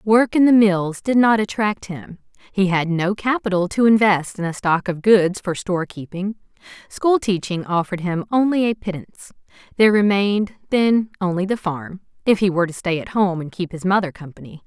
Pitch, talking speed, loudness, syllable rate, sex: 195 Hz, 190 wpm, -19 LUFS, 5.3 syllables/s, female